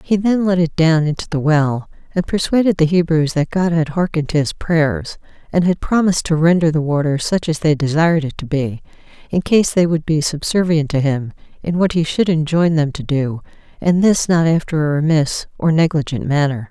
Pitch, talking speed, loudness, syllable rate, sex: 160 Hz, 210 wpm, -17 LUFS, 5.3 syllables/s, female